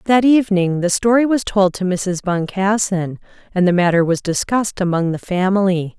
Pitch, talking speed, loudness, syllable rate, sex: 190 Hz, 170 wpm, -17 LUFS, 5.1 syllables/s, female